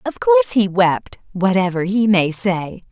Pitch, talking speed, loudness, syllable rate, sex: 210 Hz, 145 wpm, -17 LUFS, 4.2 syllables/s, female